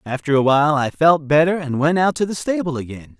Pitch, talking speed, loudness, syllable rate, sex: 150 Hz, 245 wpm, -18 LUFS, 5.9 syllables/s, male